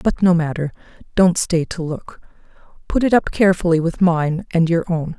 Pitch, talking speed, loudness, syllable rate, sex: 170 Hz, 185 wpm, -18 LUFS, 5.1 syllables/s, female